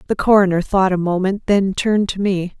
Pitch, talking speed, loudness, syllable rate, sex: 190 Hz, 210 wpm, -17 LUFS, 5.6 syllables/s, female